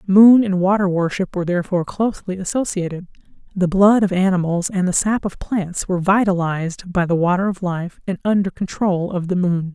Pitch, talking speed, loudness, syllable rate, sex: 185 Hz, 185 wpm, -18 LUFS, 5.6 syllables/s, female